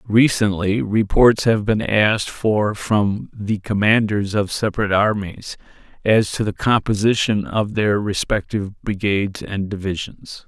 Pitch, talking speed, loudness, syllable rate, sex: 105 Hz, 125 wpm, -19 LUFS, 4.3 syllables/s, male